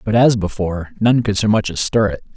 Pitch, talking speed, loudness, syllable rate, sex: 105 Hz, 255 wpm, -17 LUFS, 5.7 syllables/s, male